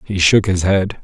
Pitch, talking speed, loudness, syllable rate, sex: 95 Hz, 235 wpm, -15 LUFS, 4.3 syllables/s, male